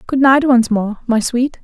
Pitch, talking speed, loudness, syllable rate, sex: 245 Hz, 220 wpm, -14 LUFS, 4.4 syllables/s, female